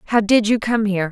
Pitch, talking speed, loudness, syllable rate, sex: 215 Hz, 270 wpm, -17 LUFS, 6.9 syllables/s, female